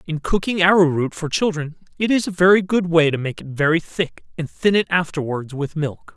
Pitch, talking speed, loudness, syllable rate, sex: 165 Hz, 225 wpm, -19 LUFS, 5.3 syllables/s, male